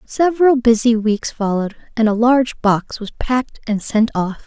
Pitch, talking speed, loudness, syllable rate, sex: 230 Hz, 175 wpm, -17 LUFS, 4.9 syllables/s, female